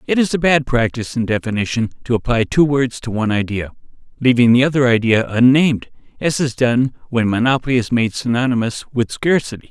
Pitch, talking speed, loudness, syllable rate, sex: 125 Hz, 180 wpm, -17 LUFS, 5.9 syllables/s, male